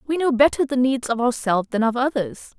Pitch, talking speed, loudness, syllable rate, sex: 250 Hz, 230 wpm, -21 LUFS, 5.9 syllables/s, female